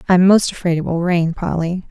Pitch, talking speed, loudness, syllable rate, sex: 175 Hz, 220 wpm, -16 LUFS, 5.2 syllables/s, female